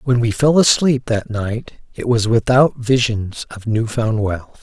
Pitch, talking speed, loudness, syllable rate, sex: 115 Hz, 180 wpm, -17 LUFS, 4.0 syllables/s, male